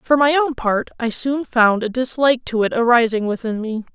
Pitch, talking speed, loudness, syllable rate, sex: 240 Hz, 215 wpm, -18 LUFS, 5.1 syllables/s, female